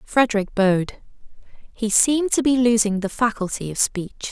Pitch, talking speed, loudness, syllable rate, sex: 220 Hz, 155 wpm, -20 LUFS, 5.2 syllables/s, female